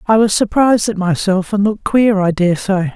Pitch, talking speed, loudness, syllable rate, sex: 200 Hz, 205 wpm, -14 LUFS, 5.7 syllables/s, female